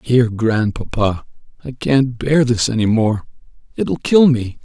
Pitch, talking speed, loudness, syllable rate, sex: 120 Hz, 140 wpm, -16 LUFS, 3.9 syllables/s, male